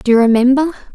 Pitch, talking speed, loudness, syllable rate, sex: 255 Hz, 190 wpm, -13 LUFS, 6.9 syllables/s, female